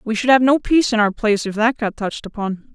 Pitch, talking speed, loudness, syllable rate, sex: 225 Hz, 285 wpm, -18 LUFS, 6.5 syllables/s, female